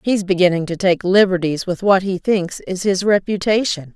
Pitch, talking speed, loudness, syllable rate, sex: 190 Hz, 180 wpm, -17 LUFS, 5.0 syllables/s, female